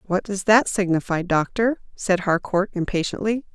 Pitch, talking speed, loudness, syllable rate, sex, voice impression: 195 Hz, 135 wpm, -22 LUFS, 4.8 syllables/s, female, very feminine, very adult-like, middle-aged, thin, slightly tensed, slightly weak, bright, soft, very clear, very fluent, cute, slightly cool, very intellectual, refreshing, sincere, calm, friendly, reassuring, very unique, very elegant, very sweet, lively, kind, slightly intense, sharp, light